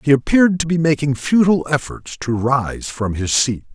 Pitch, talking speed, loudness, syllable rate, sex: 145 Hz, 190 wpm, -17 LUFS, 5.0 syllables/s, male